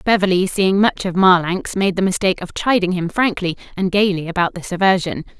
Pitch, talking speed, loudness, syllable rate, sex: 185 Hz, 190 wpm, -17 LUFS, 5.6 syllables/s, female